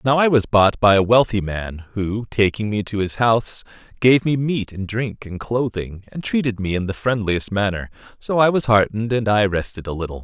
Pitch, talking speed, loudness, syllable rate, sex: 110 Hz, 215 wpm, -19 LUFS, 5.2 syllables/s, male